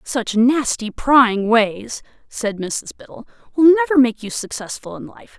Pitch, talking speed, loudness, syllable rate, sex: 245 Hz, 155 wpm, -17 LUFS, 4.2 syllables/s, female